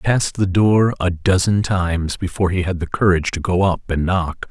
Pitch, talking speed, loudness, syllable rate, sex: 90 Hz, 225 wpm, -18 LUFS, 5.6 syllables/s, male